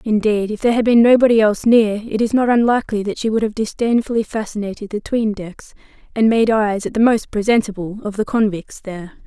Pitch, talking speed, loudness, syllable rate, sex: 215 Hz, 205 wpm, -17 LUFS, 5.9 syllables/s, female